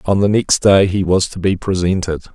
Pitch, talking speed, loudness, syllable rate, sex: 95 Hz, 230 wpm, -15 LUFS, 5.2 syllables/s, male